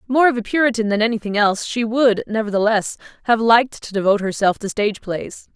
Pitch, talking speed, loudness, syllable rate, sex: 220 Hz, 195 wpm, -18 LUFS, 6.2 syllables/s, female